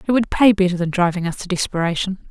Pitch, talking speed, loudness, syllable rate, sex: 185 Hz, 235 wpm, -19 LUFS, 6.5 syllables/s, female